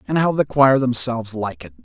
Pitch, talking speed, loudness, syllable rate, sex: 130 Hz, 230 wpm, -18 LUFS, 5.6 syllables/s, male